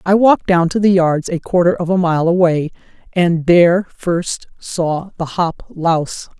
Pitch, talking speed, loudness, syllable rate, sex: 175 Hz, 180 wpm, -15 LUFS, 4.4 syllables/s, female